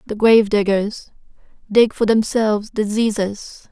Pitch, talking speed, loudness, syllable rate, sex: 215 Hz, 115 wpm, -17 LUFS, 4.3 syllables/s, female